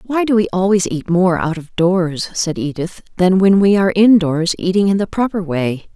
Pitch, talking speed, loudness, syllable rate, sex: 185 Hz, 210 wpm, -15 LUFS, 4.8 syllables/s, female